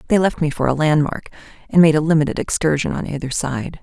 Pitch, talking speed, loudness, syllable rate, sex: 155 Hz, 220 wpm, -18 LUFS, 6.4 syllables/s, female